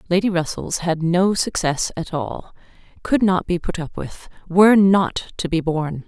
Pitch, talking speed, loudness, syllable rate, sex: 175 Hz, 180 wpm, -19 LUFS, 4.5 syllables/s, female